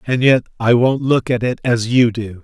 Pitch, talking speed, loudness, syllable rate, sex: 120 Hz, 245 wpm, -16 LUFS, 4.6 syllables/s, male